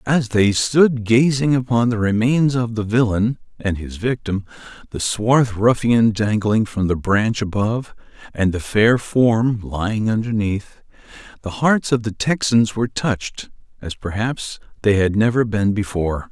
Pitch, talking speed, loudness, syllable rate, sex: 110 Hz, 145 wpm, -18 LUFS, 4.3 syllables/s, male